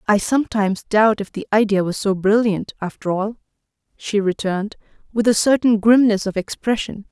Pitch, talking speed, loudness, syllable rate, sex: 210 Hz, 160 wpm, -19 LUFS, 5.3 syllables/s, female